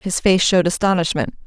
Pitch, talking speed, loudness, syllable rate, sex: 180 Hz, 165 wpm, -17 LUFS, 6.1 syllables/s, female